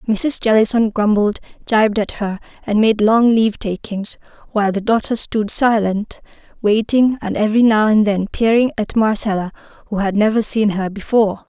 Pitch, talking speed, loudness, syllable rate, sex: 215 Hz, 160 wpm, -16 LUFS, 5.2 syllables/s, female